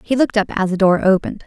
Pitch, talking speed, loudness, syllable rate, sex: 200 Hz, 285 wpm, -16 LUFS, 7.8 syllables/s, female